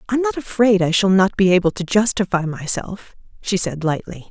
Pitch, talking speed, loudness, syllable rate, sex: 195 Hz, 195 wpm, -18 LUFS, 5.2 syllables/s, female